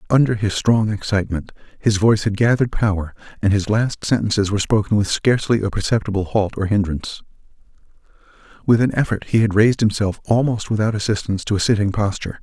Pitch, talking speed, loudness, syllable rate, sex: 105 Hz, 175 wpm, -19 LUFS, 6.5 syllables/s, male